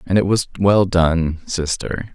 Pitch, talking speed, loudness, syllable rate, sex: 90 Hz, 140 wpm, -18 LUFS, 3.8 syllables/s, male